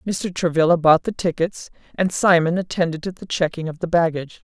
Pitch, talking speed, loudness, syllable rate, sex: 170 Hz, 185 wpm, -20 LUFS, 5.7 syllables/s, female